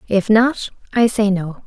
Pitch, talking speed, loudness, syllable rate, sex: 215 Hz, 180 wpm, -17 LUFS, 4.1 syllables/s, female